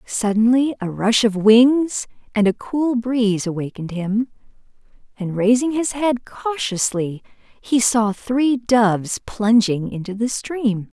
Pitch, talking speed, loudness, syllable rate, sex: 225 Hz, 130 wpm, -19 LUFS, 3.8 syllables/s, female